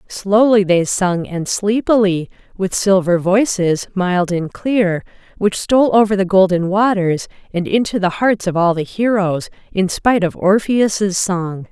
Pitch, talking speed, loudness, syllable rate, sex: 195 Hz, 155 wpm, -16 LUFS, 4.1 syllables/s, female